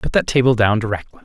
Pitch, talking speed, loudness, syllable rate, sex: 115 Hz, 240 wpm, -17 LUFS, 6.8 syllables/s, male